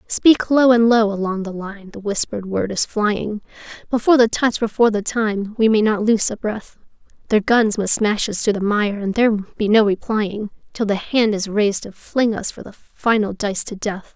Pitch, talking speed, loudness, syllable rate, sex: 210 Hz, 215 wpm, -18 LUFS, 4.9 syllables/s, female